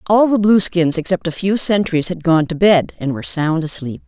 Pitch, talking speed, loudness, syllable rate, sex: 175 Hz, 220 wpm, -16 LUFS, 5.2 syllables/s, female